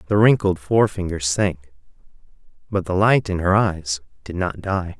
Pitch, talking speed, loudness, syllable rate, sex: 95 Hz, 155 wpm, -20 LUFS, 4.8 syllables/s, male